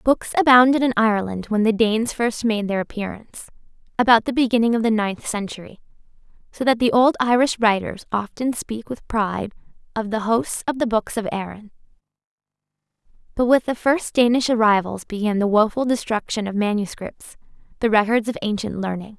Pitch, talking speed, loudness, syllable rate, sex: 220 Hz, 165 wpm, -20 LUFS, 5.5 syllables/s, female